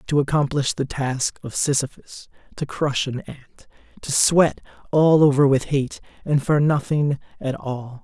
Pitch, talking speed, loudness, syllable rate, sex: 140 Hz, 155 wpm, -21 LUFS, 4.4 syllables/s, male